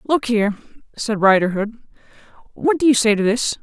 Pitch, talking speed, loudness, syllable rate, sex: 230 Hz, 165 wpm, -18 LUFS, 5.5 syllables/s, female